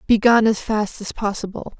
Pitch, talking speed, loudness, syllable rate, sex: 210 Hz, 165 wpm, -19 LUFS, 5.5 syllables/s, female